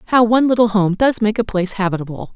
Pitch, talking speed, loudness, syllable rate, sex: 210 Hz, 230 wpm, -16 LUFS, 7.2 syllables/s, female